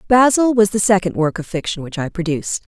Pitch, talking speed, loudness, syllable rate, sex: 190 Hz, 220 wpm, -17 LUFS, 6.0 syllables/s, female